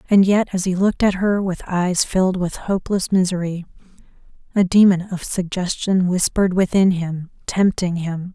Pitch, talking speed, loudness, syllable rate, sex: 185 Hz, 160 wpm, -19 LUFS, 5.0 syllables/s, female